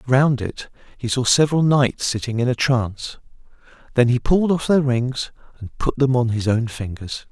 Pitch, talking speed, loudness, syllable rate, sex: 125 Hz, 190 wpm, -20 LUFS, 5.2 syllables/s, male